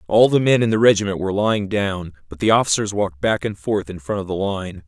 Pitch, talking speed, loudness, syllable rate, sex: 100 Hz, 260 wpm, -19 LUFS, 6.2 syllables/s, male